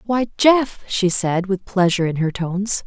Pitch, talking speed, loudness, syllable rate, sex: 195 Hz, 190 wpm, -19 LUFS, 4.6 syllables/s, female